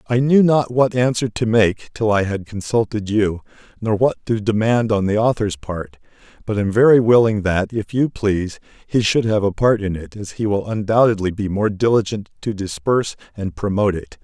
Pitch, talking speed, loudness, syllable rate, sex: 110 Hz, 200 wpm, -18 LUFS, 5.1 syllables/s, male